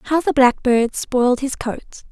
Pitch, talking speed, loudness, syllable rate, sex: 260 Hz, 170 wpm, -18 LUFS, 4.4 syllables/s, female